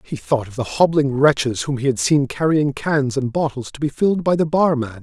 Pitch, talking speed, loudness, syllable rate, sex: 140 Hz, 240 wpm, -19 LUFS, 5.3 syllables/s, male